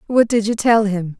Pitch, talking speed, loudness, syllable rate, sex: 215 Hz, 250 wpm, -16 LUFS, 4.9 syllables/s, female